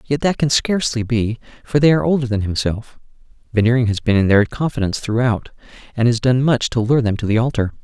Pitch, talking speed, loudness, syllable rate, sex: 120 Hz, 215 wpm, -18 LUFS, 6.2 syllables/s, male